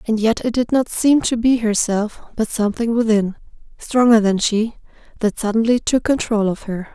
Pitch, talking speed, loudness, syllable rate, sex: 225 Hz, 180 wpm, -18 LUFS, 5.0 syllables/s, female